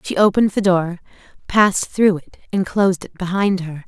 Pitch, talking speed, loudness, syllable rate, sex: 190 Hz, 185 wpm, -18 LUFS, 5.4 syllables/s, female